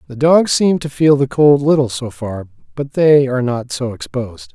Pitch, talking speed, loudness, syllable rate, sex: 135 Hz, 210 wpm, -15 LUFS, 4.9 syllables/s, male